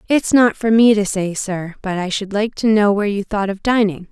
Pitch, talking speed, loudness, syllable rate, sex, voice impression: 205 Hz, 260 wpm, -17 LUFS, 5.2 syllables/s, female, feminine, adult-like, slightly powerful, bright, soft, fluent, slightly cute, calm, friendly, reassuring, elegant, slightly lively, kind, slightly modest